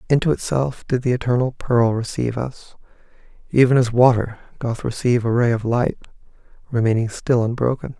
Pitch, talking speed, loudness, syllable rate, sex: 120 Hz, 150 wpm, -20 LUFS, 5.6 syllables/s, male